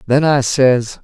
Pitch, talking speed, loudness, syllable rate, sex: 130 Hz, 175 wpm, -14 LUFS, 3.4 syllables/s, male